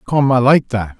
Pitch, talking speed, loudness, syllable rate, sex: 125 Hz, 240 wpm, -14 LUFS, 4.9 syllables/s, male